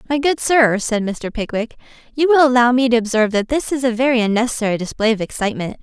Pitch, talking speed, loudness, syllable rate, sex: 240 Hz, 215 wpm, -17 LUFS, 6.5 syllables/s, female